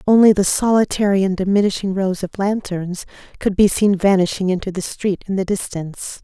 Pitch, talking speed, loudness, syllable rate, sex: 190 Hz, 175 wpm, -18 LUFS, 5.5 syllables/s, female